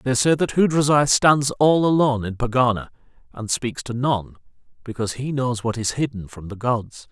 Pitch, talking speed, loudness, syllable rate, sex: 125 Hz, 185 wpm, -20 LUFS, 5.1 syllables/s, male